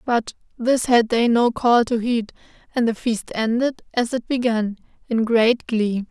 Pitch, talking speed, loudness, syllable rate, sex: 235 Hz, 175 wpm, -20 LUFS, 4.0 syllables/s, female